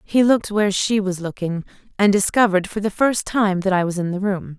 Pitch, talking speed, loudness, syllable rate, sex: 195 Hz, 220 wpm, -19 LUFS, 5.8 syllables/s, female